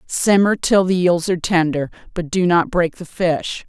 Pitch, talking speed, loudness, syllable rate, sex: 175 Hz, 195 wpm, -18 LUFS, 4.6 syllables/s, female